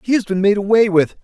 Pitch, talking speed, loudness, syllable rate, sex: 205 Hz, 295 wpm, -15 LUFS, 6.4 syllables/s, male